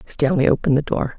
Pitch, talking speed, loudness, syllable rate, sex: 145 Hz, 205 wpm, -19 LUFS, 6.6 syllables/s, female